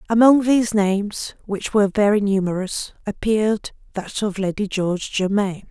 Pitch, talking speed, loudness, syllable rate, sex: 205 Hz, 135 wpm, -20 LUFS, 5.0 syllables/s, female